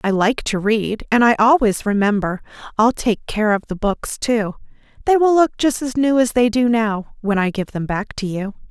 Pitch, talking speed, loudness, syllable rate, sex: 225 Hz, 220 wpm, -18 LUFS, 4.7 syllables/s, female